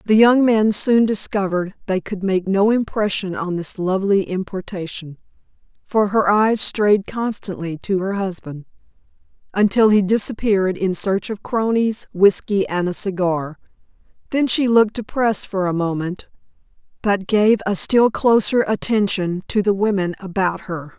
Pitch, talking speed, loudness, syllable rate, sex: 200 Hz, 145 wpm, -19 LUFS, 4.6 syllables/s, female